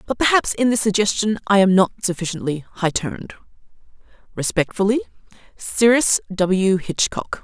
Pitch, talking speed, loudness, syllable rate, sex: 200 Hz, 115 wpm, -19 LUFS, 5.0 syllables/s, female